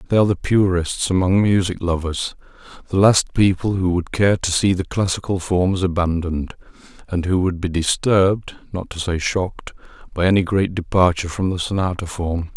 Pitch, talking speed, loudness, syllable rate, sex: 90 Hz, 170 wpm, -19 LUFS, 5.3 syllables/s, male